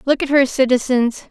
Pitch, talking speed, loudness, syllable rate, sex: 260 Hz, 185 wpm, -16 LUFS, 5.2 syllables/s, female